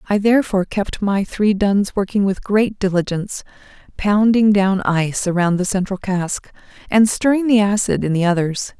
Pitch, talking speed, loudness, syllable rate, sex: 200 Hz, 165 wpm, -17 LUFS, 5.0 syllables/s, female